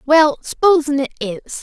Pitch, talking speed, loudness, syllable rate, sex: 285 Hz, 150 wpm, -16 LUFS, 3.1 syllables/s, female